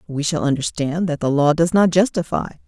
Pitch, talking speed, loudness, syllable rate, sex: 160 Hz, 200 wpm, -19 LUFS, 5.3 syllables/s, female